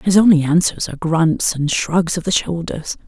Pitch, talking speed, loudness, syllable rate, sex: 170 Hz, 195 wpm, -17 LUFS, 4.7 syllables/s, female